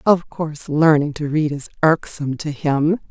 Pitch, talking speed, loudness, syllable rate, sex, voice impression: 150 Hz, 175 wpm, -19 LUFS, 4.7 syllables/s, female, feminine, middle-aged, tensed, slightly powerful, bright, clear, fluent, intellectual, friendly, reassuring, lively, kind